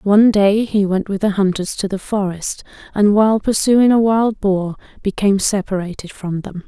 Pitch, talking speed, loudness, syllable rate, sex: 200 Hz, 180 wpm, -16 LUFS, 4.9 syllables/s, female